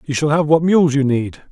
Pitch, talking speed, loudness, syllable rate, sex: 145 Hz, 275 wpm, -15 LUFS, 5.3 syllables/s, male